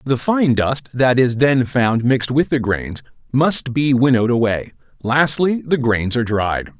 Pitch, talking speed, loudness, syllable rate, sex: 130 Hz, 175 wpm, -17 LUFS, 4.3 syllables/s, male